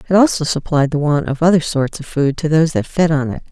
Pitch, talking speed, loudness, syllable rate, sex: 155 Hz, 275 wpm, -16 LUFS, 6.2 syllables/s, female